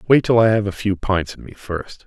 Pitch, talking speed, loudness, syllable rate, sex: 100 Hz, 290 wpm, -19 LUFS, 5.3 syllables/s, male